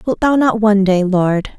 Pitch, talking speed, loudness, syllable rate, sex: 210 Hz, 225 wpm, -14 LUFS, 4.8 syllables/s, female